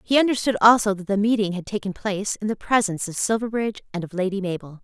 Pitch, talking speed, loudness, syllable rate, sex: 205 Hz, 225 wpm, -22 LUFS, 6.8 syllables/s, female